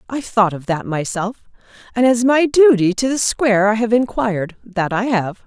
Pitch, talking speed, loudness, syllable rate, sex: 220 Hz, 185 wpm, -17 LUFS, 4.9 syllables/s, female